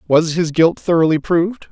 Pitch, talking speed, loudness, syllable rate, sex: 165 Hz, 175 wpm, -16 LUFS, 5.2 syllables/s, male